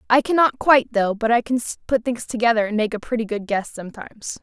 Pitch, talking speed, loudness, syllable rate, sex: 230 Hz, 230 wpm, -20 LUFS, 6.3 syllables/s, female